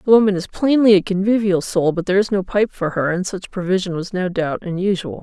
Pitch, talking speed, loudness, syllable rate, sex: 190 Hz, 240 wpm, -18 LUFS, 5.9 syllables/s, female